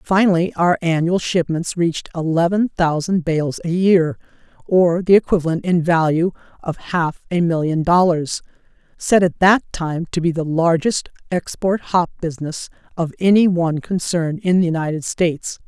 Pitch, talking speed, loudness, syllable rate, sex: 170 Hz, 145 wpm, -18 LUFS, 4.7 syllables/s, female